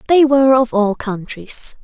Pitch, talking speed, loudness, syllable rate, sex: 240 Hz, 165 wpm, -15 LUFS, 4.3 syllables/s, female